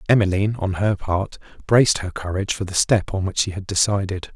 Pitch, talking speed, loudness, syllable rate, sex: 95 Hz, 205 wpm, -21 LUFS, 5.9 syllables/s, male